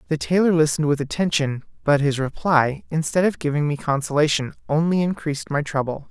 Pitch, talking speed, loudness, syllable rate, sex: 150 Hz, 165 wpm, -21 LUFS, 5.8 syllables/s, male